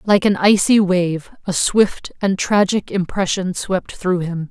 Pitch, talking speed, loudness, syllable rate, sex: 185 Hz, 160 wpm, -17 LUFS, 3.8 syllables/s, female